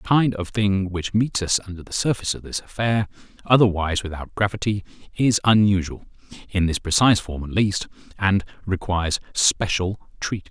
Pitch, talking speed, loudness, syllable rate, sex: 100 Hz, 150 wpm, -22 LUFS, 5.3 syllables/s, male